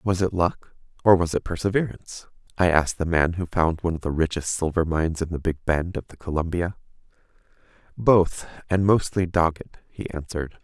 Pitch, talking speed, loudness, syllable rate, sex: 85 Hz, 180 wpm, -23 LUFS, 5.7 syllables/s, male